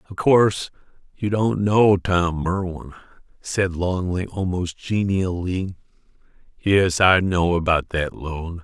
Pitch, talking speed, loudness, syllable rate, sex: 95 Hz, 120 wpm, -21 LUFS, 3.6 syllables/s, male